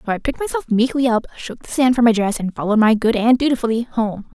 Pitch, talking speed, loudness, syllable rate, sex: 230 Hz, 260 wpm, -18 LUFS, 6.6 syllables/s, female